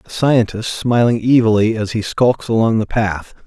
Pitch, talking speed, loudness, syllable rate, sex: 110 Hz, 175 wpm, -16 LUFS, 4.5 syllables/s, male